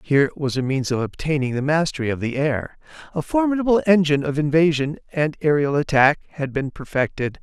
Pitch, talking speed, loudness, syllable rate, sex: 150 Hz, 180 wpm, -21 LUFS, 5.8 syllables/s, male